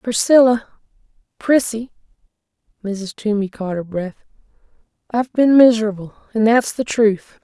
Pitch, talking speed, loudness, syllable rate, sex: 220 Hz, 90 wpm, -17 LUFS, 4.7 syllables/s, female